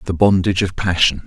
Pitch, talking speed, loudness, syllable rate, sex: 95 Hz, 190 wpm, -16 LUFS, 6.4 syllables/s, male